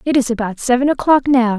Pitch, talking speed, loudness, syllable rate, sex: 250 Hz, 225 wpm, -15 LUFS, 6.0 syllables/s, female